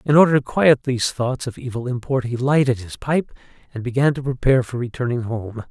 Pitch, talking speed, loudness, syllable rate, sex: 130 Hz, 210 wpm, -20 LUFS, 5.8 syllables/s, male